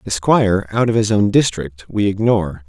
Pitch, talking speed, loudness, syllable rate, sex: 100 Hz, 200 wpm, -16 LUFS, 5.2 syllables/s, male